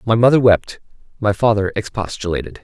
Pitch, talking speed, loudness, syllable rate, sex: 105 Hz, 135 wpm, -17 LUFS, 5.7 syllables/s, male